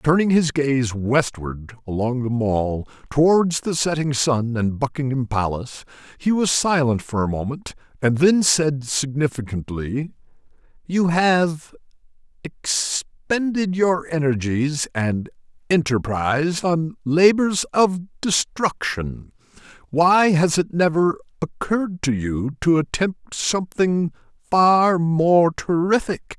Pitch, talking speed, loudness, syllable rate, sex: 150 Hz, 110 wpm, -20 LUFS, 3.7 syllables/s, male